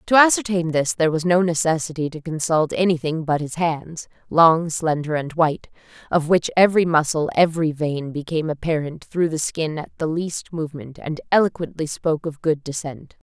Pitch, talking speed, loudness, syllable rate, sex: 160 Hz, 170 wpm, -21 LUFS, 5.3 syllables/s, female